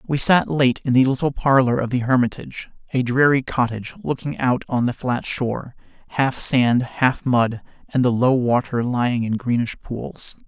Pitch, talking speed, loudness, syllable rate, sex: 125 Hz, 180 wpm, -20 LUFS, 4.7 syllables/s, male